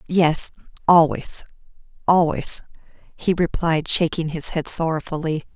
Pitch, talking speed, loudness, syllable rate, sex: 165 Hz, 95 wpm, -20 LUFS, 4.2 syllables/s, female